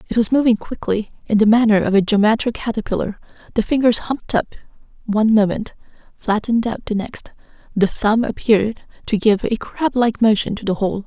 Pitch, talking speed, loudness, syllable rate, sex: 220 Hz, 180 wpm, -18 LUFS, 5.8 syllables/s, female